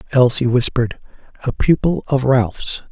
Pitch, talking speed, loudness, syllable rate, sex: 125 Hz, 125 wpm, -17 LUFS, 4.7 syllables/s, male